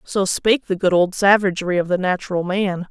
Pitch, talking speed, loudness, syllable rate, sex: 190 Hz, 205 wpm, -18 LUFS, 5.7 syllables/s, female